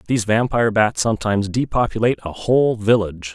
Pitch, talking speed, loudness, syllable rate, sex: 110 Hz, 145 wpm, -19 LUFS, 6.6 syllables/s, male